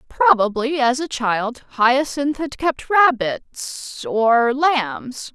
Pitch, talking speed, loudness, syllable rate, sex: 260 Hz, 110 wpm, -19 LUFS, 2.8 syllables/s, female